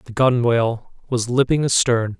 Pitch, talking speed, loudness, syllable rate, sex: 120 Hz, 135 wpm, -19 LUFS, 4.7 syllables/s, male